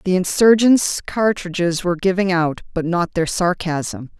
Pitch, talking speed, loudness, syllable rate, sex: 180 Hz, 145 wpm, -18 LUFS, 4.5 syllables/s, female